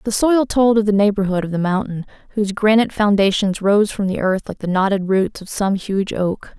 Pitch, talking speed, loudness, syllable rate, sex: 200 Hz, 220 wpm, -18 LUFS, 5.4 syllables/s, female